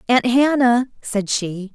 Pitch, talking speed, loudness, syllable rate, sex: 235 Hz, 140 wpm, -18 LUFS, 3.5 syllables/s, female